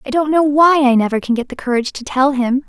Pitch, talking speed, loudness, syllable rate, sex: 265 Hz, 290 wpm, -15 LUFS, 6.3 syllables/s, female